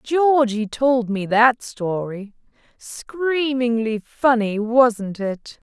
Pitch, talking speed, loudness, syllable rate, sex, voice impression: 240 Hz, 95 wpm, -20 LUFS, 2.8 syllables/s, female, feminine, slightly young, slightly bright, slightly muffled, slightly halting, friendly, unique, slightly lively, slightly intense